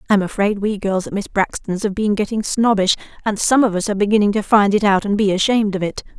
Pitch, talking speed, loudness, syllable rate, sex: 205 Hz, 250 wpm, -17 LUFS, 6.3 syllables/s, female